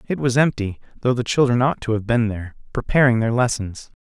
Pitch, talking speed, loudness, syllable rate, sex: 120 Hz, 210 wpm, -20 LUFS, 5.9 syllables/s, male